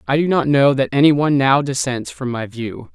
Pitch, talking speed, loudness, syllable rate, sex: 135 Hz, 245 wpm, -17 LUFS, 5.4 syllables/s, male